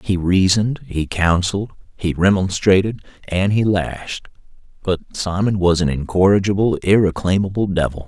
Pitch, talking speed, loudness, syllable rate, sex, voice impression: 95 Hz, 120 wpm, -18 LUFS, 4.8 syllables/s, male, masculine, middle-aged, thick, tensed, powerful, slightly hard, slightly muffled, slightly raspy, cool, intellectual, calm, mature, slightly reassuring, wild, lively, slightly strict